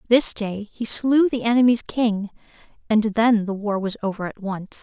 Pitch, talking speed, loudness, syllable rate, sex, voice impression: 220 Hz, 185 wpm, -21 LUFS, 4.6 syllables/s, female, feminine, slightly adult-like, slightly soft, slightly cute, friendly, slightly sweet, kind